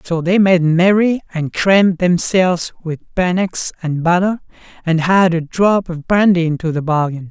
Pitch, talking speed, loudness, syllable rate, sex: 175 Hz, 165 wpm, -15 LUFS, 4.5 syllables/s, male